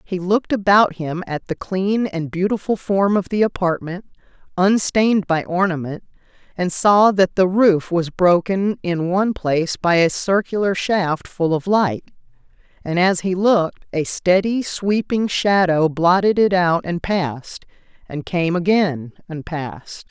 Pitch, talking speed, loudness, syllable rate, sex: 185 Hz, 150 wpm, -18 LUFS, 4.2 syllables/s, female